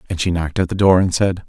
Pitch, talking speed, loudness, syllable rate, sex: 90 Hz, 325 wpm, -17 LUFS, 7.2 syllables/s, male